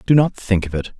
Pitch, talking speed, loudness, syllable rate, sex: 110 Hz, 305 wpm, -19 LUFS, 5.9 syllables/s, male